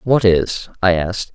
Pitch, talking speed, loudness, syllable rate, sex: 95 Hz, 180 wpm, -17 LUFS, 4.4 syllables/s, male